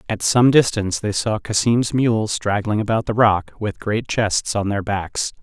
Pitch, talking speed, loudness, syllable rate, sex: 105 Hz, 190 wpm, -19 LUFS, 4.3 syllables/s, male